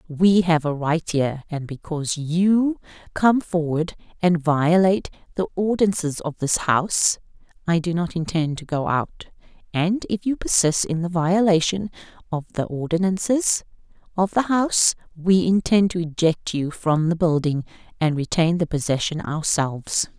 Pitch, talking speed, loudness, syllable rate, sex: 170 Hz, 150 wpm, -21 LUFS, 4.6 syllables/s, female